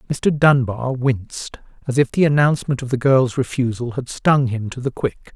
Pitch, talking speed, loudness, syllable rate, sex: 130 Hz, 190 wpm, -19 LUFS, 4.9 syllables/s, male